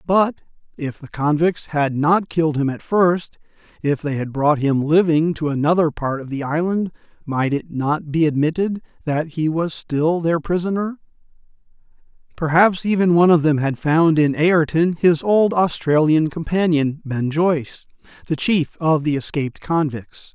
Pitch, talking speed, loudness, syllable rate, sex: 160 Hz, 160 wpm, -19 LUFS, 4.5 syllables/s, male